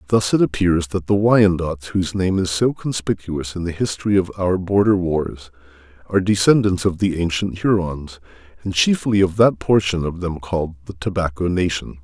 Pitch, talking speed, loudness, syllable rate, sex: 90 Hz, 175 wpm, -19 LUFS, 5.1 syllables/s, male